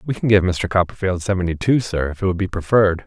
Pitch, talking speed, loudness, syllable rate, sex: 95 Hz, 255 wpm, -19 LUFS, 6.5 syllables/s, male